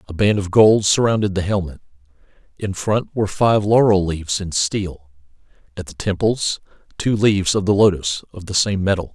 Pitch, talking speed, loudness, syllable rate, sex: 95 Hz, 175 wpm, -18 LUFS, 5.2 syllables/s, male